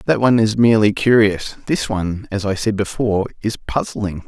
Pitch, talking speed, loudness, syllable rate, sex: 105 Hz, 185 wpm, -18 LUFS, 5.7 syllables/s, male